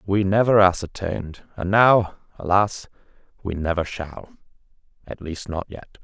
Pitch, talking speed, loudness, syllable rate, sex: 95 Hz, 130 wpm, -21 LUFS, 4.5 syllables/s, male